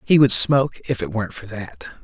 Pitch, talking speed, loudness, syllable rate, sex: 115 Hz, 235 wpm, -18 LUFS, 5.6 syllables/s, male